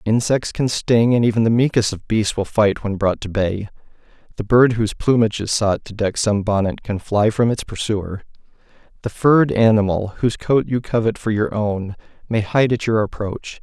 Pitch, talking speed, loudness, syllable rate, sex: 110 Hz, 200 wpm, -18 LUFS, 5.1 syllables/s, male